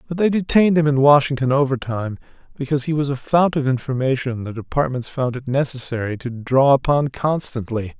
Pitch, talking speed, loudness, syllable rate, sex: 135 Hz, 175 wpm, -19 LUFS, 5.8 syllables/s, male